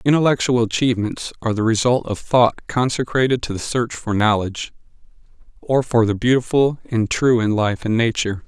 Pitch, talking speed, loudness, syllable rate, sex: 120 Hz, 165 wpm, -19 LUFS, 5.5 syllables/s, male